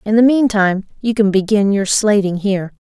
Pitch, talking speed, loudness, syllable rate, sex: 205 Hz, 190 wpm, -15 LUFS, 5.5 syllables/s, female